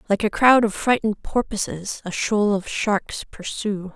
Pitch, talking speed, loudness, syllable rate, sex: 210 Hz, 165 wpm, -21 LUFS, 4.4 syllables/s, female